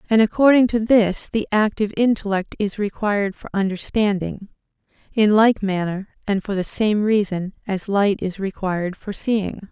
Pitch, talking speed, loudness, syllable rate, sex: 205 Hz, 155 wpm, -20 LUFS, 4.7 syllables/s, female